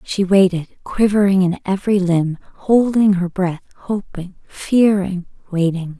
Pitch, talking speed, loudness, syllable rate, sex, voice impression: 190 Hz, 110 wpm, -17 LUFS, 4.3 syllables/s, female, very feminine, slightly young, very thin, very relaxed, very weak, dark, very soft, clear, fluent, raspy, very cute, very intellectual, slightly refreshing, very sincere, very calm, very friendly, very reassuring, very unique, very elegant, wild, very sweet, slightly lively, very kind, very modest, very light